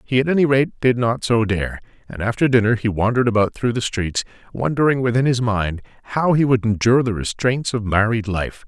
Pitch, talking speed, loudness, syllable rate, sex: 115 Hz, 200 wpm, -19 LUFS, 5.6 syllables/s, male